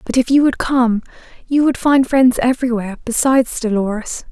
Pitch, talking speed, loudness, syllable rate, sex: 245 Hz, 165 wpm, -16 LUFS, 5.5 syllables/s, female